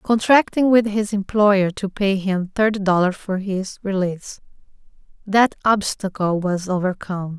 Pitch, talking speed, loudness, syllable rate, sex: 195 Hz, 130 wpm, -19 LUFS, 4.4 syllables/s, female